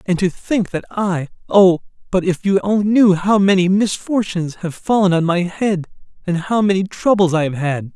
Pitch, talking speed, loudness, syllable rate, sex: 185 Hz, 190 wpm, -17 LUFS, 4.9 syllables/s, male